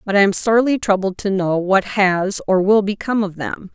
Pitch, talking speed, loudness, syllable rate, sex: 200 Hz, 225 wpm, -17 LUFS, 5.3 syllables/s, female